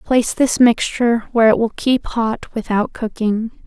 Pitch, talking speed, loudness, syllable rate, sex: 230 Hz, 165 wpm, -17 LUFS, 4.7 syllables/s, female